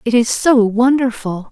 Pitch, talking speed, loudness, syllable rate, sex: 235 Hz, 160 wpm, -14 LUFS, 4.3 syllables/s, female